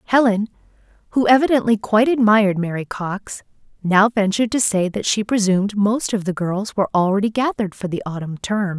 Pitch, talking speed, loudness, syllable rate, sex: 205 Hz, 170 wpm, -19 LUFS, 5.7 syllables/s, female